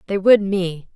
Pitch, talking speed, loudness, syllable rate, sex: 195 Hz, 190 wpm, -17 LUFS, 4.1 syllables/s, female